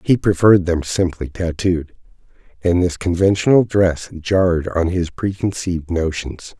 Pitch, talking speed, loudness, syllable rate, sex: 90 Hz, 125 wpm, -18 LUFS, 4.5 syllables/s, male